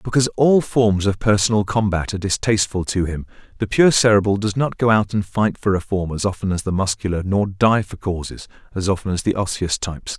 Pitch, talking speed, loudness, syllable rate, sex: 100 Hz, 210 wpm, -19 LUFS, 5.8 syllables/s, male